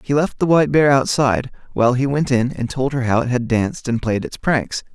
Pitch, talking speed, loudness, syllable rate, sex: 130 Hz, 255 wpm, -18 LUFS, 5.7 syllables/s, male